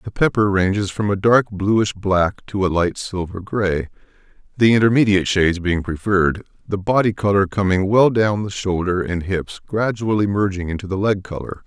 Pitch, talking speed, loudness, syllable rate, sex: 100 Hz, 175 wpm, -19 LUFS, 5.0 syllables/s, male